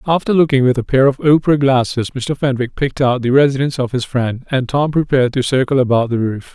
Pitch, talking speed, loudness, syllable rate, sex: 130 Hz, 230 wpm, -15 LUFS, 6.2 syllables/s, male